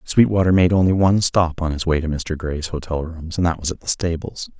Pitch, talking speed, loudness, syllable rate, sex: 85 Hz, 250 wpm, -19 LUFS, 5.7 syllables/s, male